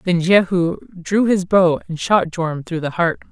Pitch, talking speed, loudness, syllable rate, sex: 175 Hz, 200 wpm, -18 LUFS, 4.3 syllables/s, female